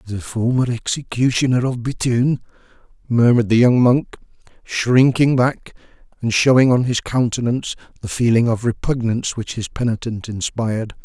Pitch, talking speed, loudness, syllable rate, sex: 120 Hz, 130 wpm, -18 LUFS, 5.1 syllables/s, male